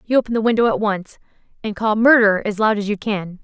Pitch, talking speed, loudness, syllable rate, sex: 210 Hz, 245 wpm, -17 LUFS, 5.9 syllables/s, female